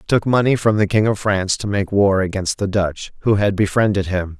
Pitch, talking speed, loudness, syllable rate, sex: 100 Hz, 245 wpm, -18 LUFS, 5.6 syllables/s, male